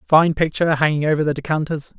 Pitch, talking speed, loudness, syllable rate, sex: 155 Hz, 180 wpm, -19 LUFS, 6.7 syllables/s, male